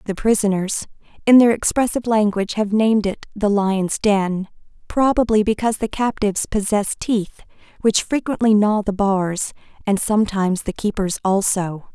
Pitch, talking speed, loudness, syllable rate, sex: 205 Hz, 140 wpm, -19 LUFS, 5.0 syllables/s, female